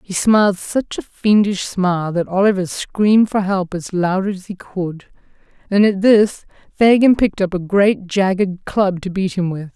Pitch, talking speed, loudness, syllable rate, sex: 190 Hz, 185 wpm, -17 LUFS, 4.4 syllables/s, female